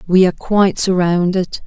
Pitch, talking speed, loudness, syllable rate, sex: 185 Hz, 145 wpm, -15 LUFS, 5.4 syllables/s, female